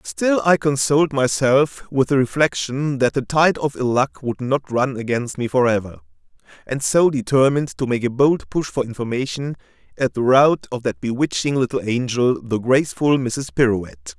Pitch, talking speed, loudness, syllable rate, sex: 130 Hz, 175 wpm, -19 LUFS, 5.0 syllables/s, male